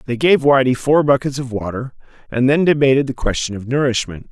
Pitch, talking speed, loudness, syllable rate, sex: 130 Hz, 195 wpm, -16 LUFS, 5.8 syllables/s, male